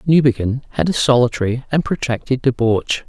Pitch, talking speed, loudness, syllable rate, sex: 130 Hz, 135 wpm, -17 LUFS, 5.4 syllables/s, male